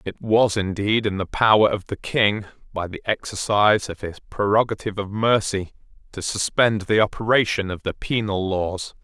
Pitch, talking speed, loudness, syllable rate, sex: 105 Hz, 165 wpm, -21 LUFS, 4.9 syllables/s, male